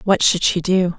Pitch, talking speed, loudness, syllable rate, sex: 180 Hz, 245 wpm, -17 LUFS, 4.5 syllables/s, female